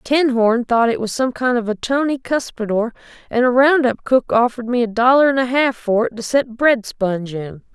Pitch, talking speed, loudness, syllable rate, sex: 240 Hz, 225 wpm, -17 LUFS, 5.1 syllables/s, female